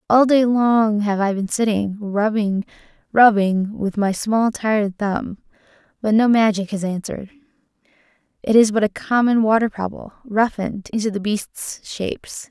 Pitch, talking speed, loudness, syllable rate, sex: 215 Hz, 150 wpm, -19 LUFS, 4.6 syllables/s, female